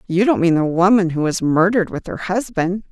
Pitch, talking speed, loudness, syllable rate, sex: 185 Hz, 225 wpm, -17 LUFS, 5.5 syllables/s, female